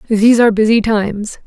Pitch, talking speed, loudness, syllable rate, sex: 215 Hz, 165 wpm, -12 LUFS, 6.5 syllables/s, female